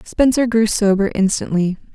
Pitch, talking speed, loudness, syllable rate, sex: 210 Hz, 125 wpm, -17 LUFS, 4.7 syllables/s, female